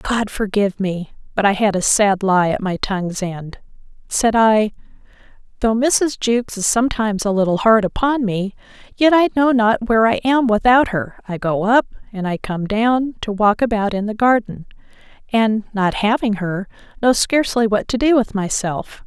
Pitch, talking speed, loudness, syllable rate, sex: 215 Hz, 185 wpm, -17 LUFS, 4.3 syllables/s, female